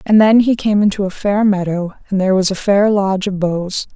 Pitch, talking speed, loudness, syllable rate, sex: 195 Hz, 245 wpm, -15 LUFS, 5.5 syllables/s, female